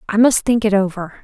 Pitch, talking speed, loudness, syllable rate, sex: 210 Hz, 245 wpm, -16 LUFS, 5.7 syllables/s, female